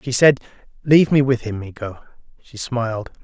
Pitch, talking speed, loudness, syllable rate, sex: 125 Hz, 165 wpm, -18 LUFS, 5.4 syllables/s, male